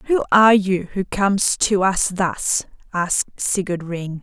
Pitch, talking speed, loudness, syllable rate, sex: 190 Hz, 155 wpm, -19 LUFS, 4.3 syllables/s, female